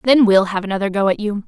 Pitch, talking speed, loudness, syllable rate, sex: 205 Hz, 285 wpm, -16 LUFS, 6.6 syllables/s, female